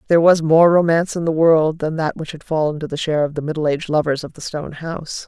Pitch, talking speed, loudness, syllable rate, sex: 160 Hz, 275 wpm, -18 LUFS, 6.7 syllables/s, female